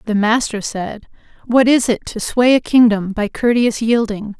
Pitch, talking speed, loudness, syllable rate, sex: 225 Hz, 175 wpm, -16 LUFS, 4.6 syllables/s, female